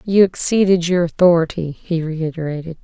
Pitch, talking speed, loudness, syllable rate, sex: 170 Hz, 125 wpm, -17 LUFS, 5.2 syllables/s, female